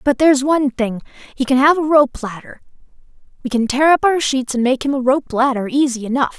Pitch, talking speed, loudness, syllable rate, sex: 265 Hz, 225 wpm, -16 LUFS, 5.9 syllables/s, female